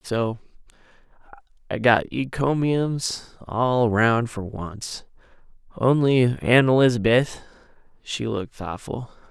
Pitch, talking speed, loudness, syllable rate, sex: 120 Hz, 85 wpm, -22 LUFS, 3.5 syllables/s, male